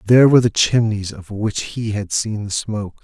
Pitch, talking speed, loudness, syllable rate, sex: 105 Hz, 220 wpm, -18 LUFS, 5.3 syllables/s, male